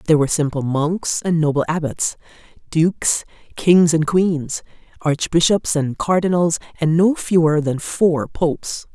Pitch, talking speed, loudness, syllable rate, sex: 160 Hz, 135 wpm, -18 LUFS, 4.3 syllables/s, female